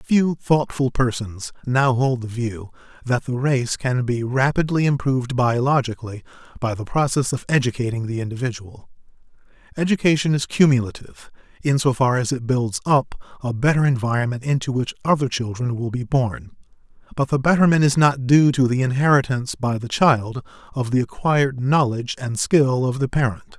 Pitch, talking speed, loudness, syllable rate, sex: 130 Hz, 160 wpm, -20 LUFS, 5.2 syllables/s, male